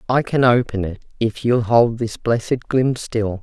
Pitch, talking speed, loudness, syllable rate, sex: 115 Hz, 190 wpm, -19 LUFS, 4.2 syllables/s, female